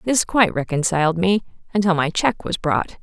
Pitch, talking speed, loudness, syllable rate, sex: 180 Hz, 180 wpm, -20 LUFS, 5.4 syllables/s, female